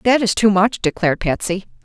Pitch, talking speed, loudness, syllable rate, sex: 200 Hz, 195 wpm, -17 LUFS, 5.8 syllables/s, female